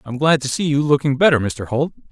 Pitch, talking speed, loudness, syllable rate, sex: 140 Hz, 255 wpm, -18 LUFS, 5.9 syllables/s, male